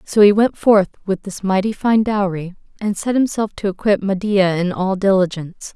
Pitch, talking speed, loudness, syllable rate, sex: 195 Hz, 190 wpm, -17 LUFS, 5.0 syllables/s, female